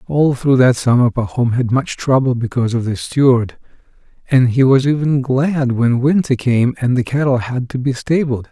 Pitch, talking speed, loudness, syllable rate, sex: 130 Hz, 190 wpm, -15 LUFS, 4.9 syllables/s, male